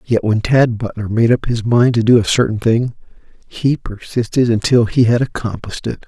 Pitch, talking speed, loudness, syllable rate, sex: 115 Hz, 195 wpm, -16 LUFS, 5.1 syllables/s, male